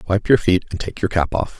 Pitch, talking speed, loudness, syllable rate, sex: 95 Hz, 300 wpm, -19 LUFS, 5.9 syllables/s, male